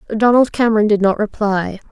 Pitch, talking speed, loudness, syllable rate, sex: 215 Hz, 155 wpm, -15 LUFS, 5.6 syllables/s, female